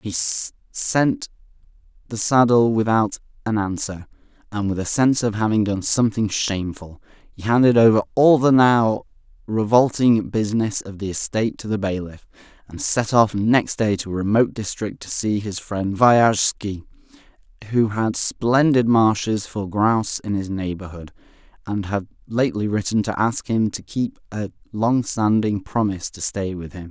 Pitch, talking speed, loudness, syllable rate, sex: 105 Hz, 155 wpm, -20 LUFS, 4.7 syllables/s, male